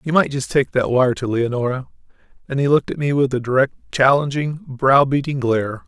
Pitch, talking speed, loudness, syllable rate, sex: 135 Hz, 205 wpm, -18 LUFS, 5.7 syllables/s, male